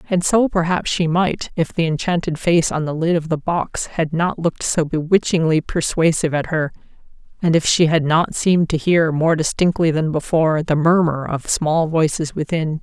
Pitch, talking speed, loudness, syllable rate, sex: 165 Hz, 190 wpm, -18 LUFS, 5.0 syllables/s, female